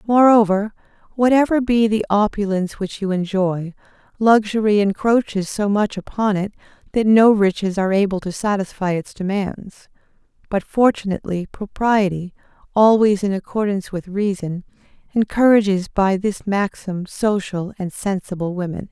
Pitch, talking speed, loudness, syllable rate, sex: 200 Hz, 125 wpm, -19 LUFS, 4.8 syllables/s, female